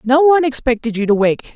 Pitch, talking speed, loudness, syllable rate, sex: 215 Hz, 230 wpm, -15 LUFS, 6.2 syllables/s, male